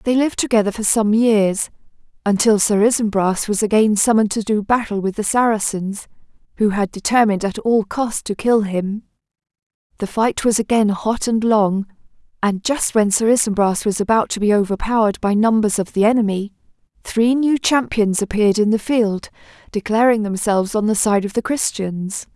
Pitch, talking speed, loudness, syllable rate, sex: 215 Hz, 170 wpm, -18 LUFS, 5.2 syllables/s, female